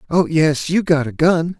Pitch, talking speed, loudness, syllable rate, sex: 160 Hz, 225 wpm, -17 LUFS, 4.4 syllables/s, male